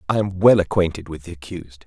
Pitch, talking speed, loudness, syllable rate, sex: 90 Hz, 225 wpm, -18 LUFS, 6.5 syllables/s, male